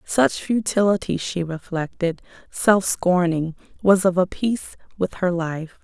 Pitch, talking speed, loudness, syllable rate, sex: 180 Hz, 135 wpm, -21 LUFS, 4.1 syllables/s, female